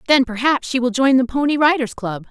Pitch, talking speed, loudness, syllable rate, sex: 255 Hz, 235 wpm, -17 LUFS, 5.7 syllables/s, female